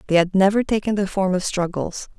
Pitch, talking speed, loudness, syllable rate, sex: 190 Hz, 220 wpm, -20 LUFS, 5.8 syllables/s, female